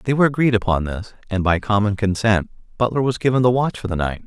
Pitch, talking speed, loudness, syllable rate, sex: 110 Hz, 240 wpm, -19 LUFS, 6.3 syllables/s, male